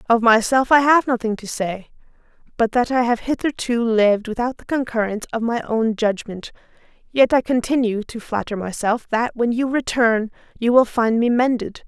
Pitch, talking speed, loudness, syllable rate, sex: 235 Hz, 175 wpm, -19 LUFS, 5.1 syllables/s, female